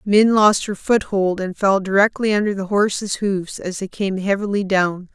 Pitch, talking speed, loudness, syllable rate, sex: 195 Hz, 185 wpm, -19 LUFS, 4.6 syllables/s, female